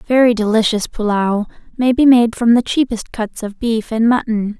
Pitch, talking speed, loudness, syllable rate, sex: 225 Hz, 185 wpm, -15 LUFS, 4.8 syllables/s, female